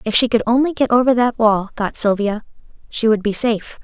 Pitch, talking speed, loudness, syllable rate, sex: 225 Hz, 220 wpm, -17 LUFS, 5.7 syllables/s, female